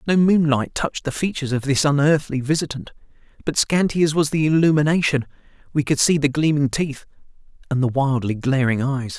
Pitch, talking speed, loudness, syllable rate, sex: 145 Hz, 165 wpm, -20 LUFS, 5.7 syllables/s, male